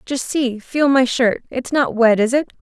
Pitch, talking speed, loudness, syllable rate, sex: 255 Hz, 225 wpm, -17 LUFS, 4.2 syllables/s, female